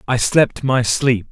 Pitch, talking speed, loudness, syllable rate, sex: 125 Hz, 180 wpm, -16 LUFS, 3.6 syllables/s, male